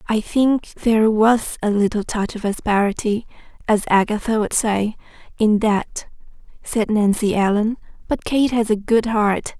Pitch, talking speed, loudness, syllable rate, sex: 215 Hz, 150 wpm, -19 LUFS, 4.4 syllables/s, female